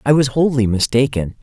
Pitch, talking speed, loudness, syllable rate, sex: 125 Hz, 170 wpm, -16 LUFS, 5.5 syllables/s, female